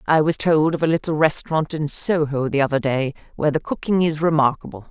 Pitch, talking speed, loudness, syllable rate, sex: 150 Hz, 210 wpm, -20 LUFS, 5.9 syllables/s, female